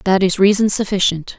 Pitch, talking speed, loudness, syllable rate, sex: 195 Hz, 175 wpm, -15 LUFS, 5.5 syllables/s, female